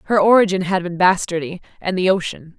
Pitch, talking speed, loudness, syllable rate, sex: 185 Hz, 185 wpm, -17 LUFS, 5.9 syllables/s, female